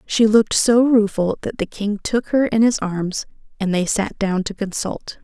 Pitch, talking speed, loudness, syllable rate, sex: 205 Hz, 205 wpm, -19 LUFS, 4.5 syllables/s, female